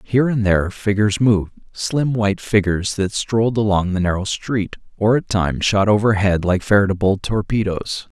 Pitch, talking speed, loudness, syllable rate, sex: 105 Hz, 160 wpm, -18 LUFS, 5.4 syllables/s, male